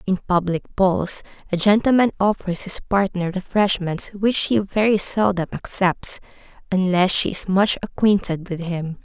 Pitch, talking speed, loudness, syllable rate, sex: 190 Hz, 140 wpm, -20 LUFS, 4.4 syllables/s, female